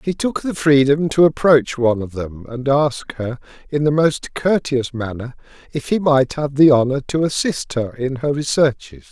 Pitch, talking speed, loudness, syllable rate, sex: 140 Hz, 190 wpm, -18 LUFS, 4.6 syllables/s, male